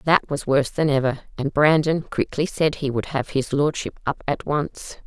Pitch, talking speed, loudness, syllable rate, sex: 145 Hz, 200 wpm, -22 LUFS, 4.8 syllables/s, female